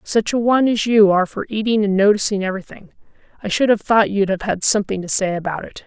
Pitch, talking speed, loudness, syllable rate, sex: 205 Hz, 235 wpm, -17 LUFS, 6.5 syllables/s, female